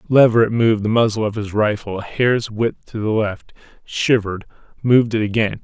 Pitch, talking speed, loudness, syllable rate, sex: 110 Hz, 180 wpm, -18 LUFS, 5.5 syllables/s, male